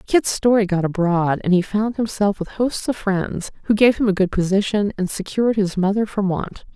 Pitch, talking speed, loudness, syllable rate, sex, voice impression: 200 Hz, 215 wpm, -19 LUFS, 5.1 syllables/s, female, very feminine, adult-like, slightly middle-aged, slightly thin, slightly relaxed, slightly weak, bright, very soft, clear, fluent, slightly raspy, cute, slightly cool, very intellectual, refreshing, very sincere, very calm, very friendly, very reassuring, very unique, very elegant, slightly wild, very sweet, lively, very kind, slightly intense, slightly modest, slightly light